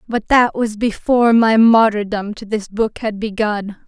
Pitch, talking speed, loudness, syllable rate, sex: 215 Hz, 170 wpm, -16 LUFS, 4.3 syllables/s, female